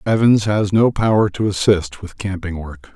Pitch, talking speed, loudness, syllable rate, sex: 100 Hz, 185 wpm, -17 LUFS, 4.6 syllables/s, male